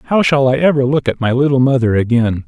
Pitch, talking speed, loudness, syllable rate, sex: 130 Hz, 245 wpm, -14 LUFS, 6.2 syllables/s, male